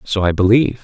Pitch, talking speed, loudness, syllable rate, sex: 105 Hz, 215 wpm, -15 LUFS, 6.9 syllables/s, male